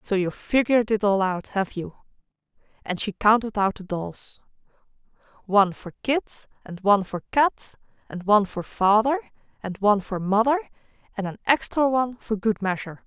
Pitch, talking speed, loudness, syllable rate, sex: 215 Hz, 160 wpm, -23 LUFS, 5.4 syllables/s, female